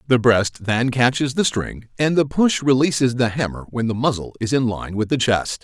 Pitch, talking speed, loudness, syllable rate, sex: 125 Hz, 225 wpm, -19 LUFS, 5.0 syllables/s, male